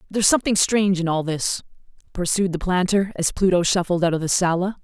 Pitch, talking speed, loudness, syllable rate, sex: 185 Hz, 200 wpm, -20 LUFS, 6.2 syllables/s, female